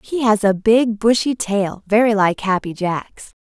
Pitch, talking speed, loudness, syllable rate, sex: 210 Hz, 175 wpm, -17 LUFS, 4.1 syllables/s, female